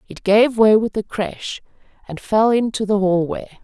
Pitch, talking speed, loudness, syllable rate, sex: 205 Hz, 200 wpm, -17 LUFS, 4.6 syllables/s, female